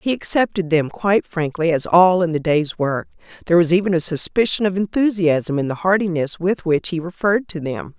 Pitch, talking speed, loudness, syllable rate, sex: 175 Hz, 205 wpm, -19 LUFS, 5.4 syllables/s, female